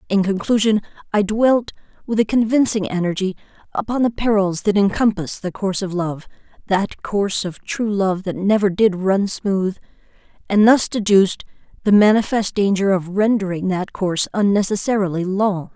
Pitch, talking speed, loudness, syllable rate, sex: 200 Hz, 140 wpm, -18 LUFS, 5.0 syllables/s, female